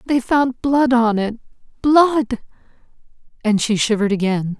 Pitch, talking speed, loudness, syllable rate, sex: 240 Hz, 130 wpm, -17 LUFS, 4.2 syllables/s, female